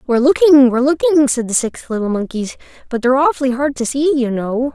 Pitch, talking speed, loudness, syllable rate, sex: 265 Hz, 215 wpm, -15 LUFS, 6.1 syllables/s, female